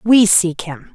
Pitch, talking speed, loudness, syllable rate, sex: 185 Hz, 190 wpm, -13 LUFS, 3.3 syllables/s, female